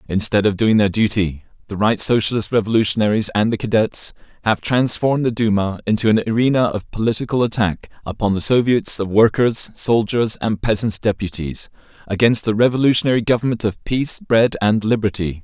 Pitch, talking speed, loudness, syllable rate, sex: 110 Hz, 155 wpm, -18 LUFS, 5.6 syllables/s, male